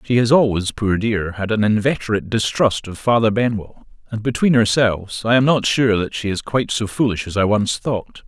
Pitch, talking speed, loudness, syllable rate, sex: 110 Hz, 210 wpm, -18 LUFS, 5.3 syllables/s, male